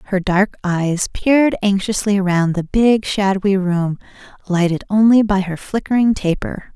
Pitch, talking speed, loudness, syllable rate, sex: 195 Hz, 140 wpm, -17 LUFS, 4.6 syllables/s, female